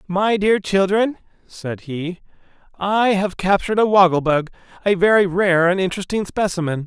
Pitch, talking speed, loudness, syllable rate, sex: 190 Hz, 140 wpm, -18 LUFS, 4.9 syllables/s, male